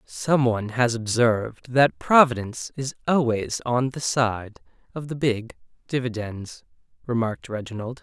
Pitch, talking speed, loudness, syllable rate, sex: 120 Hz, 120 wpm, -23 LUFS, 4.5 syllables/s, male